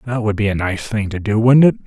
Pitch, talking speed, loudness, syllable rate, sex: 110 Hz, 320 wpm, -16 LUFS, 6.1 syllables/s, male